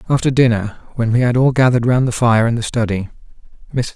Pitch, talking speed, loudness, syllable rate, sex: 120 Hz, 195 wpm, -16 LUFS, 6.6 syllables/s, male